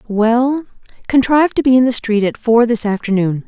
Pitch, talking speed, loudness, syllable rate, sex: 235 Hz, 170 wpm, -14 LUFS, 5.2 syllables/s, female